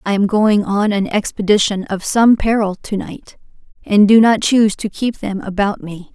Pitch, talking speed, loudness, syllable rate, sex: 205 Hz, 195 wpm, -15 LUFS, 4.7 syllables/s, female